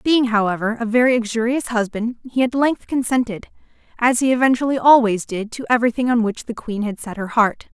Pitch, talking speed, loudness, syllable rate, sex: 235 Hz, 185 wpm, -19 LUFS, 5.7 syllables/s, female